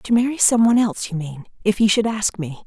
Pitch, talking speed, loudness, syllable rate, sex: 210 Hz, 250 wpm, -19 LUFS, 6.2 syllables/s, female